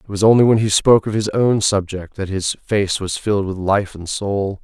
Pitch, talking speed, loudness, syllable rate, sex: 100 Hz, 245 wpm, -17 LUFS, 5.1 syllables/s, male